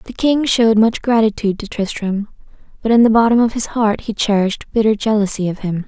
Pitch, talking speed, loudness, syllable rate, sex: 215 Hz, 205 wpm, -16 LUFS, 5.9 syllables/s, female